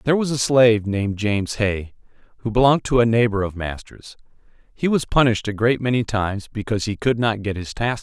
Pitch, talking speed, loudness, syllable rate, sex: 110 Hz, 215 wpm, -20 LUFS, 6.2 syllables/s, male